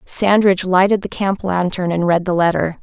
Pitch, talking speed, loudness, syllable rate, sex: 185 Hz, 190 wpm, -16 LUFS, 5.2 syllables/s, female